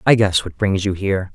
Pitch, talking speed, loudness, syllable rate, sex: 95 Hz, 265 wpm, -18 LUFS, 5.7 syllables/s, male